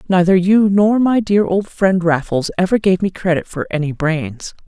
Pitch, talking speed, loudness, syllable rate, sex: 185 Hz, 190 wpm, -15 LUFS, 4.6 syllables/s, female